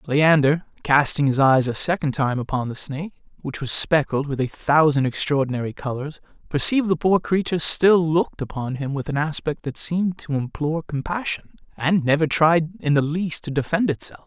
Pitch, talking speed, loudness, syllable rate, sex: 150 Hz, 180 wpm, -21 LUFS, 5.4 syllables/s, male